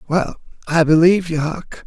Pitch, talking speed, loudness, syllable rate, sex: 165 Hz, 160 wpm, -16 LUFS, 4.3 syllables/s, male